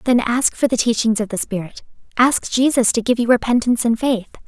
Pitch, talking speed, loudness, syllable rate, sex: 235 Hz, 215 wpm, -17 LUFS, 5.7 syllables/s, female